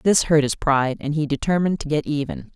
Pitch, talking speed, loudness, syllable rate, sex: 150 Hz, 235 wpm, -21 LUFS, 6.1 syllables/s, female